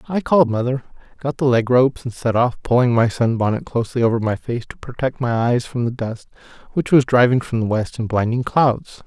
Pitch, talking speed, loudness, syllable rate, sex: 125 Hz, 225 wpm, -19 LUFS, 5.6 syllables/s, male